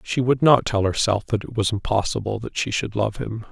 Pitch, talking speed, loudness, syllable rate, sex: 110 Hz, 240 wpm, -22 LUFS, 5.4 syllables/s, male